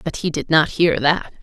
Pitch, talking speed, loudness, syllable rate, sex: 160 Hz, 255 wpm, -18 LUFS, 4.8 syllables/s, female